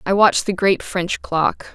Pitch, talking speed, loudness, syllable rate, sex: 185 Hz, 205 wpm, -18 LUFS, 4.5 syllables/s, female